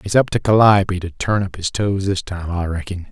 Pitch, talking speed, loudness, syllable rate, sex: 95 Hz, 250 wpm, -18 LUFS, 5.4 syllables/s, male